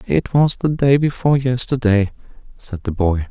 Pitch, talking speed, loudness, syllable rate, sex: 120 Hz, 165 wpm, -17 LUFS, 4.9 syllables/s, male